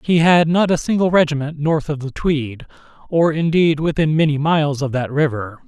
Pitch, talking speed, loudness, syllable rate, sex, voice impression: 150 Hz, 190 wpm, -17 LUFS, 5.1 syllables/s, male, masculine, adult-like, slightly muffled, friendly, unique, slightly kind